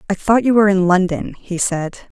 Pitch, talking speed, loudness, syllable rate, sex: 195 Hz, 220 wpm, -16 LUFS, 5.4 syllables/s, female